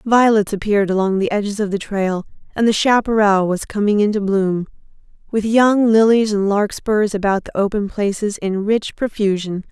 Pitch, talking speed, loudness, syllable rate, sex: 205 Hz, 165 wpm, -17 LUFS, 5.0 syllables/s, female